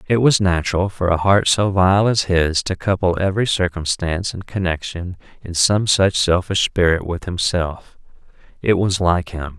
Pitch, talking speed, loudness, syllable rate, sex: 90 Hz, 170 wpm, -18 LUFS, 4.7 syllables/s, male